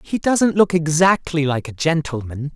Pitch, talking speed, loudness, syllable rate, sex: 160 Hz, 165 wpm, -18 LUFS, 4.5 syllables/s, male